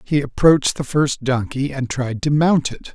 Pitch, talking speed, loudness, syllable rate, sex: 140 Hz, 205 wpm, -18 LUFS, 4.6 syllables/s, male